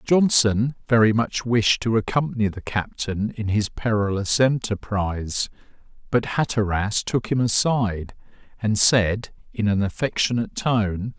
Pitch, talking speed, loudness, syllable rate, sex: 110 Hz, 125 wpm, -22 LUFS, 4.3 syllables/s, male